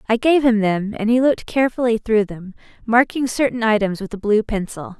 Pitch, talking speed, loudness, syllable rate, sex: 225 Hz, 205 wpm, -18 LUFS, 5.6 syllables/s, female